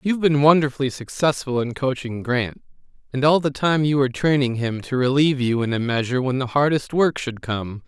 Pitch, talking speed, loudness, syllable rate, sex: 135 Hz, 205 wpm, -21 LUFS, 5.7 syllables/s, male